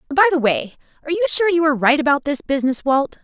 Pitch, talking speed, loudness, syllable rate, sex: 295 Hz, 260 wpm, -18 LUFS, 7.6 syllables/s, female